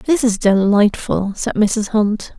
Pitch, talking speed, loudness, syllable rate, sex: 215 Hz, 150 wpm, -16 LUFS, 3.5 syllables/s, female